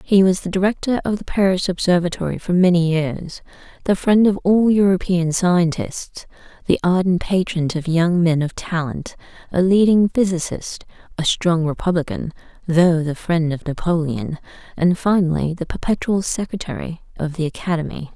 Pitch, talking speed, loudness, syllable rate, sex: 175 Hz, 145 wpm, -19 LUFS, 4.9 syllables/s, female